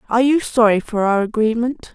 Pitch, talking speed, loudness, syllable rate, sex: 230 Hz, 185 wpm, -17 LUFS, 5.7 syllables/s, female